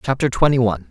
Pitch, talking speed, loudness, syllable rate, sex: 115 Hz, 200 wpm, -18 LUFS, 7.7 syllables/s, male